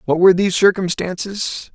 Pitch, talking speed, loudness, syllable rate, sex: 185 Hz, 140 wpm, -17 LUFS, 5.5 syllables/s, male